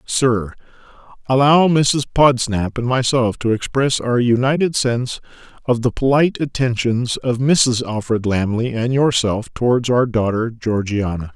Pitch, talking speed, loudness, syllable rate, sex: 120 Hz, 130 wpm, -17 LUFS, 4.4 syllables/s, male